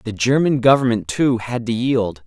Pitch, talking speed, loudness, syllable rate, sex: 120 Hz, 185 wpm, -18 LUFS, 4.7 syllables/s, male